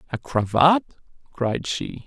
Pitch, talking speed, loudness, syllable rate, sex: 140 Hz, 115 wpm, -22 LUFS, 3.7 syllables/s, male